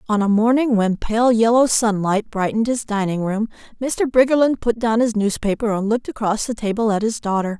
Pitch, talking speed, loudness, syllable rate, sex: 220 Hz, 200 wpm, -19 LUFS, 5.5 syllables/s, female